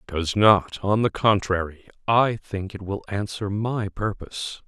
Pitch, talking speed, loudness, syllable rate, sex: 100 Hz, 165 wpm, -23 LUFS, 4.3 syllables/s, male